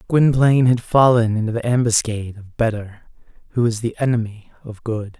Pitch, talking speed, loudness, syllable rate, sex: 115 Hz, 160 wpm, -18 LUFS, 5.4 syllables/s, male